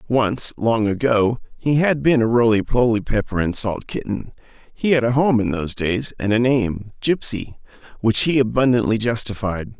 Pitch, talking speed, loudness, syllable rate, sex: 115 Hz, 170 wpm, -19 LUFS, 4.8 syllables/s, male